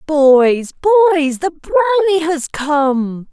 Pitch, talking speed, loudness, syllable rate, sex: 315 Hz, 110 wpm, -14 LUFS, 3.1 syllables/s, female